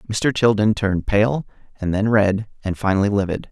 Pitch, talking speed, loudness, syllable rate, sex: 105 Hz, 170 wpm, -19 LUFS, 5.3 syllables/s, male